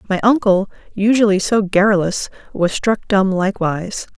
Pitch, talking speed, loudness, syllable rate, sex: 200 Hz, 130 wpm, -16 LUFS, 5.0 syllables/s, female